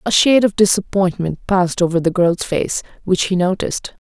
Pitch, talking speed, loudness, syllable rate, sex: 185 Hz, 175 wpm, -17 LUFS, 5.5 syllables/s, female